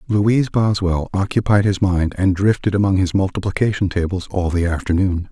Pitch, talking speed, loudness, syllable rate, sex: 95 Hz, 160 wpm, -18 LUFS, 5.3 syllables/s, male